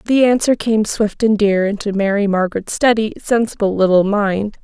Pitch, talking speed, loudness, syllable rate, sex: 210 Hz, 170 wpm, -16 LUFS, 5.0 syllables/s, female